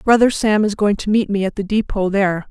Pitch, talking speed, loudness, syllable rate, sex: 205 Hz, 265 wpm, -17 LUFS, 5.9 syllables/s, female